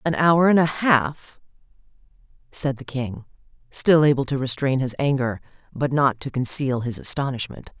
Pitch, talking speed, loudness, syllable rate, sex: 135 Hz, 155 wpm, -22 LUFS, 4.6 syllables/s, female